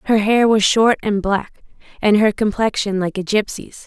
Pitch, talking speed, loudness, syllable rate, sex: 210 Hz, 185 wpm, -17 LUFS, 4.6 syllables/s, female